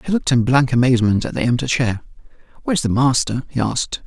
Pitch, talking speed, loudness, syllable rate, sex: 125 Hz, 205 wpm, -18 LUFS, 6.7 syllables/s, male